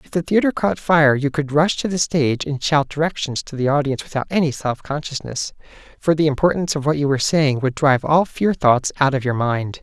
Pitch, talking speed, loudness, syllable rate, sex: 145 Hz, 230 wpm, -19 LUFS, 5.8 syllables/s, male